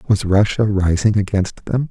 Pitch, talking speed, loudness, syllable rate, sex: 100 Hz, 160 wpm, -17 LUFS, 4.3 syllables/s, male